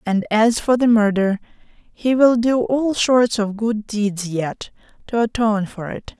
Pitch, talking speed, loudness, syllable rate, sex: 220 Hz, 175 wpm, -18 LUFS, 4.0 syllables/s, female